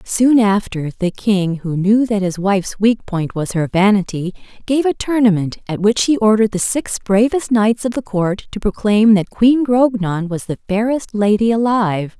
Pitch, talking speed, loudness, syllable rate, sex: 210 Hz, 185 wpm, -16 LUFS, 4.6 syllables/s, female